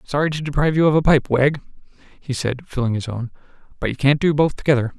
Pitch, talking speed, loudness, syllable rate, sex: 140 Hz, 230 wpm, -19 LUFS, 6.4 syllables/s, male